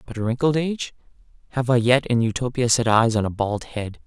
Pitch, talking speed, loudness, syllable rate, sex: 120 Hz, 205 wpm, -21 LUFS, 5.5 syllables/s, male